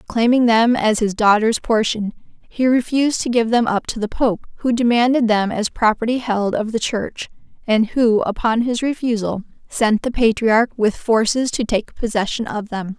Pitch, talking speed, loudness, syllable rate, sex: 225 Hz, 180 wpm, -18 LUFS, 4.7 syllables/s, female